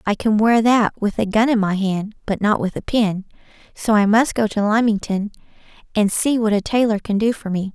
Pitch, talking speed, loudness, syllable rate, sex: 215 Hz, 230 wpm, -18 LUFS, 5.2 syllables/s, female